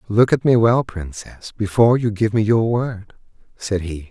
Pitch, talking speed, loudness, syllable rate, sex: 110 Hz, 190 wpm, -18 LUFS, 4.6 syllables/s, male